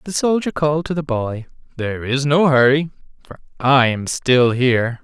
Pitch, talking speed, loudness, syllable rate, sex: 135 Hz, 180 wpm, -17 LUFS, 4.9 syllables/s, male